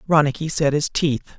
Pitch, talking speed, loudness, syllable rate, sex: 150 Hz, 175 wpm, -20 LUFS, 5.6 syllables/s, male